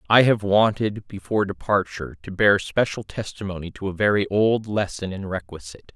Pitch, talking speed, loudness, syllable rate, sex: 100 Hz, 160 wpm, -22 LUFS, 5.5 syllables/s, male